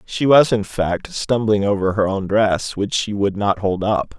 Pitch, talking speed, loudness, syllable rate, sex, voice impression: 105 Hz, 215 wpm, -18 LUFS, 4.2 syllables/s, male, very masculine, old, very thick, tensed, powerful, slightly weak, slightly dark, soft, slightly clear, fluent, slightly raspy, cool, very intellectual, refreshing, very sincere, calm, mature, very friendly, reassuring, unique, elegant, wild, slightly sweet, kind, modest